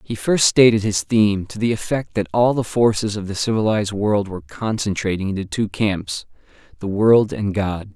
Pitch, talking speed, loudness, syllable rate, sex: 105 Hz, 180 wpm, -19 LUFS, 5.1 syllables/s, male